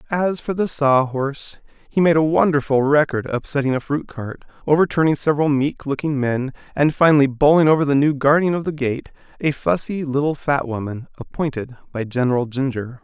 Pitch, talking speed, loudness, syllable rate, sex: 140 Hz, 170 wpm, -19 LUFS, 5.5 syllables/s, male